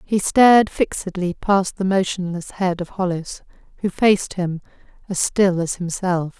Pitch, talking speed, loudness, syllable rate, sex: 185 Hz, 150 wpm, -20 LUFS, 4.5 syllables/s, female